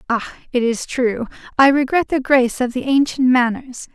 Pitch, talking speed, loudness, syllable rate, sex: 255 Hz, 180 wpm, -17 LUFS, 5.2 syllables/s, female